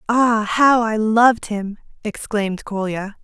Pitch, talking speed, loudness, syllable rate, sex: 220 Hz, 130 wpm, -18 LUFS, 4.0 syllables/s, female